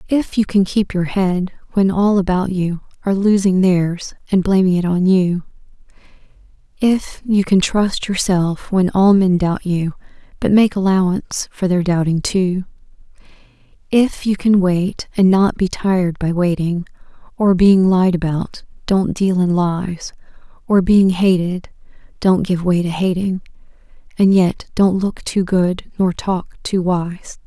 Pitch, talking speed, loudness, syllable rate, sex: 185 Hz, 155 wpm, -16 LUFS, 4.1 syllables/s, female